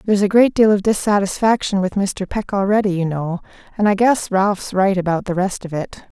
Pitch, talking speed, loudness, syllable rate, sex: 195 Hz, 215 wpm, -18 LUFS, 5.4 syllables/s, female